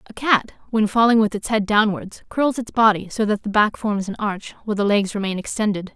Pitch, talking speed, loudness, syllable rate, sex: 210 Hz, 230 wpm, -20 LUFS, 5.6 syllables/s, female